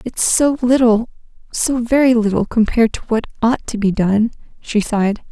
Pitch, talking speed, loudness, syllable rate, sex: 230 Hz, 160 wpm, -16 LUFS, 5.1 syllables/s, female